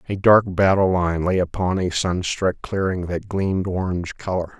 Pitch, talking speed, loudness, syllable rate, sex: 90 Hz, 170 wpm, -21 LUFS, 4.9 syllables/s, male